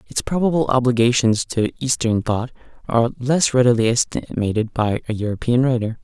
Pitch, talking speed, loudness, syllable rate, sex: 120 Hz, 140 wpm, -19 LUFS, 5.5 syllables/s, male